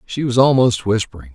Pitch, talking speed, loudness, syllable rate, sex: 120 Hz, 180 wpm, -16 LUFS, 5.9 syllables/s, male